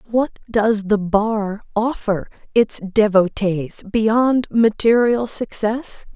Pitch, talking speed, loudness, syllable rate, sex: 215 Hz, 90 wpm, -19 LUFS, 3.1 syllables/s, female